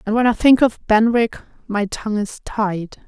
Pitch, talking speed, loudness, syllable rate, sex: 220 Hz, 195 wpm, -18 LUFS, 4.8 syllables/s, female